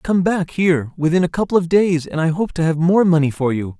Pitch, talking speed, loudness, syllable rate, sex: 165 Hz, 270 wpm, -17 LUFS, 5.7 syllables/s, male